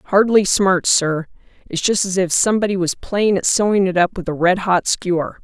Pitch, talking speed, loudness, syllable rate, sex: 185 Hz, 210 wpm, -17 LUFS, 5.0 syllables/s, female